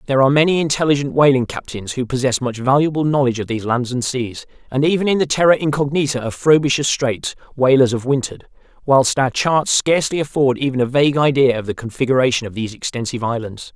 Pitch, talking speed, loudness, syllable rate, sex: 135 Hz, 190 wpm, -17 LUFS, 6.5 syllables/s, male